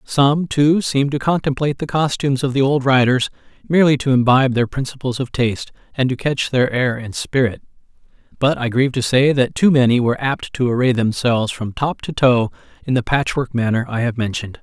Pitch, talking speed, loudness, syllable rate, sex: 130 Hz, 200 wpm, -18 LUFS, 5.8 syllables/s, male